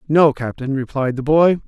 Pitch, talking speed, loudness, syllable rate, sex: 145 Hz, 180 wpm, -17 LUFS, 4.8 syllables/s, male